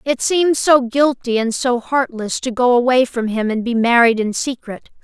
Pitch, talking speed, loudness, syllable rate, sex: 245 Hz, 205 wpm, -16 LUFS, 4.5 syllables/s, female